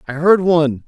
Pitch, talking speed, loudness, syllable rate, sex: 160 Hz, 205 wpm, -14 LUFS, 5.5 syllables/s, male